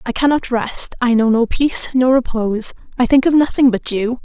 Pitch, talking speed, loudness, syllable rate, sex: 245 Hz, 210 wpm, -15 LUFS, 5.3 syllables/s, female